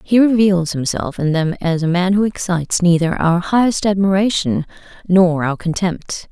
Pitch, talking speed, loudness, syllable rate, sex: 180 Hz, 160 wpm, -16 LUFS, 4.7 syllables/s, female